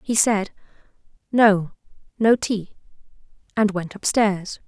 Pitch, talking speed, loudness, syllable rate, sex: 205 Hz, 105 wpm, -21 LUFS, 3.6 syllables/s, female